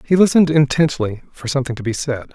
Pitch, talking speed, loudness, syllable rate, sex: 140 Hz, 205 wpm, -17 LUFS, 6.5 syllables/s, male